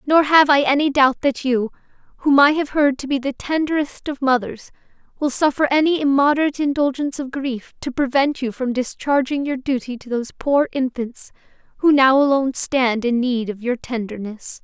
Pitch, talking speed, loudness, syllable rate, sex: 265 Hz, 180 wpm, -19 LUFS, 5.2 syllables/s, female